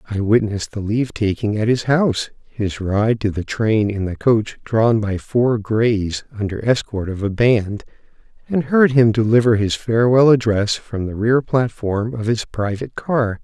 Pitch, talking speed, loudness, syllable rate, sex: 110 Hz, 180 wpm, -18 LUFS, 4.5 syllables/s, male